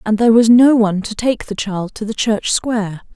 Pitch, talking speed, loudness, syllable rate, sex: 215 Hz, 245 wpm, -15 LUFS, 5.4 syllables/s, female